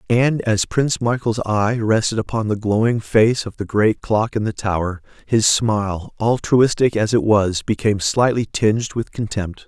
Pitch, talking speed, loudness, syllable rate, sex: 110 Hz, 175 wpm, -19 LUFS, 4.6 syllables/s, male